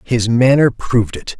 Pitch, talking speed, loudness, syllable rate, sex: 115 Hz, 170 wpm, -14 LUFS, 4.7 syllables/s, male